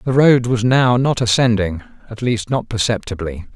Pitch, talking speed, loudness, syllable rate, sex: 115 Hz, 170 wpm, -17 LUFS, 4.8 syllables/s, male